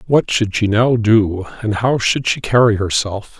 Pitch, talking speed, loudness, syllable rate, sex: 110 Hz, 195 wpm, -16 LUFS, 4.2 syllables/s, male